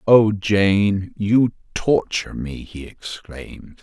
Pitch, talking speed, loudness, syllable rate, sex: 100 Hz, 110 wpm, -19 LUFS, 3.2 syllables/s, male